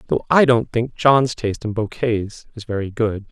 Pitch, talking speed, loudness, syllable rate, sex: 115 Hz, 200 wpm, -19 LUFS, 4.7 syllables/s, male